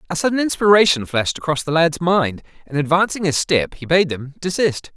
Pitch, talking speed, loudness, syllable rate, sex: 160 Hz, 195 wpm, -18 LUFS, 5.6 syllables/s, male